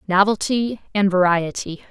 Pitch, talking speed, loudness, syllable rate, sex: 195 Hz, 95 wpm, -19 LUFS, 4.4 syllables/s, female